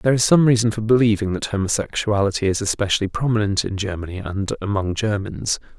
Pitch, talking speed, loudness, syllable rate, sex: 105 Hz, 165 wpm, -20 LUFS, 6.2 syllables/s, male